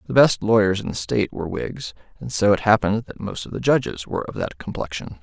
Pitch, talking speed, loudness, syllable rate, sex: 100 Hz, 240 wpm, -22 LUFS, 6.3 syllables/s, male